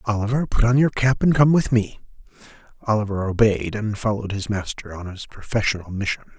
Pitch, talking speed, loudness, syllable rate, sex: 110 Hz, 180 wpm, -21 LUFS, 5.8 syllables/s, male